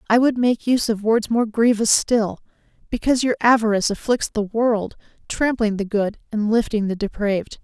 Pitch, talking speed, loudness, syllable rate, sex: 220 Hz, 175 wpm, -20 LUFS, 5.3 syllables/s, female